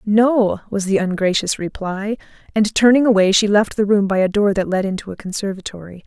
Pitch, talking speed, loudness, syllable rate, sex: 200 Hz, 200 wpm, -17 LUFS, 5.4 syllables/s, female